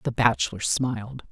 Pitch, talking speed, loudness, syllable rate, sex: 110 Hz, 135 wpm, -25 LUFS, 5.2 syllables/s, female